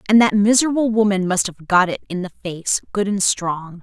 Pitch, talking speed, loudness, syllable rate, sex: 200 Hz, 220 wpm, -18 LUFS, 5.2 syllables/s, female